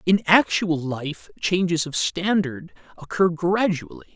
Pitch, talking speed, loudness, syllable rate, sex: 175 Hz, 115 wpm, -22 LUFS, 3.9 syllables/s, male